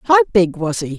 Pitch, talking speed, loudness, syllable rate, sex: 210 Hz, 245 wpm, -16 LUFS, 4.9 syllables/s, female